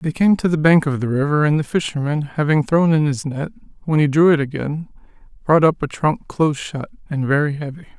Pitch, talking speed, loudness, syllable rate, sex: 150 Hz, 225 wpm, -18 LUFS, 5.7 syllables/s, male